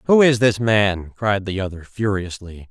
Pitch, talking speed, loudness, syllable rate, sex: 105 Hz, 175 wpm, -19 LUFS, 4.4 syllables/s, male